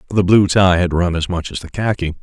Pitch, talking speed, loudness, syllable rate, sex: 90 Hz, 270 wpm, -16 LUFS, 5.6 syllables/s, male